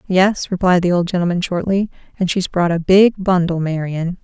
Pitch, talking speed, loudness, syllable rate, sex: 180 Hz, 185 wpm, -17 LUFS, 5.1 syllables/s, female